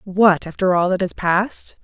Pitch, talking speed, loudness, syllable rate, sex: 190 Hz, 195 wpm, -18 LUFS, 4.7 syllables/s, female